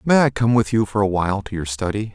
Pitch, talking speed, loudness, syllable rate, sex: 105 Hz, 310 wpm, -20 LUFS, 6.3 syllables/s, male